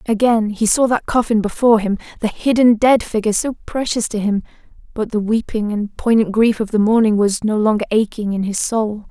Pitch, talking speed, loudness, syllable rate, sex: 220 Hz, 205 wpm, -17 LUFS, 5.5 syllables/s, female